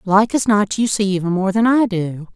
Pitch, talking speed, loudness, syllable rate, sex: 200 Hz, 255 wpm, -17 LUFS, 5.0 syllables/s, female